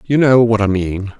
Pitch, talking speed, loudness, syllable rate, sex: 110 Hz, 250 wpm, -14 LUFS, 4.7 syllables/s, male